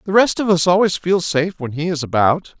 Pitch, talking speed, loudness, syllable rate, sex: 170 Hz, 255 wpm, -17 LUFS, 5.8 syllables/s, male